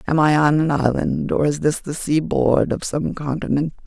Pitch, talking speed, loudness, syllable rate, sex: 145 Hz, 220 wpm, -19 LUFS, 4.7 syllables/s, female